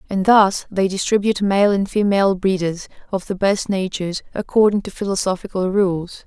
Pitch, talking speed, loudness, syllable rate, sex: 195 Hz, 155 wpm, -19 LUFS, 5.3 syllables/s, female